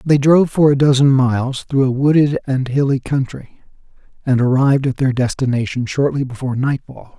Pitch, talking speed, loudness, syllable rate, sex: 135 Hz, 165 wpm, -16 LUFS, 5.5 syllables/s, male